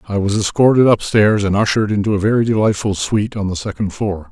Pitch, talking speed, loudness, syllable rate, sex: 105 Hz, 210 wpm, -16 LUFS, 6.3 syllables/s, male